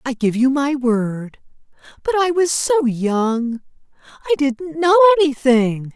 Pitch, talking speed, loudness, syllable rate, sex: 275 Hz, 130 wpm, -17 LUFS, 3.8 syllables/s, female